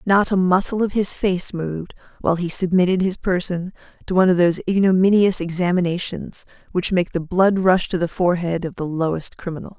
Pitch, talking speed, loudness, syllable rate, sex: 180 Hz, 185 wpm, -20 LUFS, 5.7 syllables/s, female